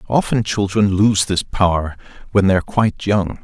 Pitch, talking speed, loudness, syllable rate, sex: 100 Hz, 175 wpm, -17 LUFS, 5.1 syllables/s, male